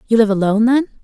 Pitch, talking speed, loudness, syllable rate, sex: 225 Hz, 230 wpm, -15 LUFS, 8.0 syllables/s, female